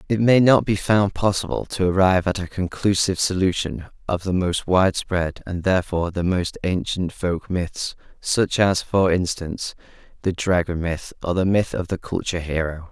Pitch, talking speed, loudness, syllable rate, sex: 90 Hz, 170 wpm, -21 LUFS, 5.0 syllables/s, male